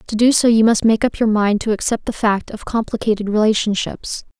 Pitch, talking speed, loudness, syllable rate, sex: 220 Hz, 220 wpm, -17 LUFS, 5.6 syllables/s, female